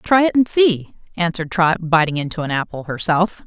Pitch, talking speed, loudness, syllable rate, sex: 175 Hz, 190 wpm, -18 LUFS, 5.3 syllables/s, female